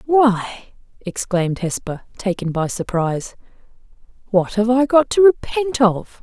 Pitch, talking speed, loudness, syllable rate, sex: 215 Hz, 125 wpm, -18 LUFS, 4.2 syllables/s, female